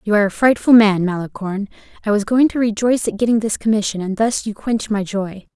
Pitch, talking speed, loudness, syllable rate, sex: 215 Hz, 225 wpm, -17 LUFS, 6.2 syllables/s, female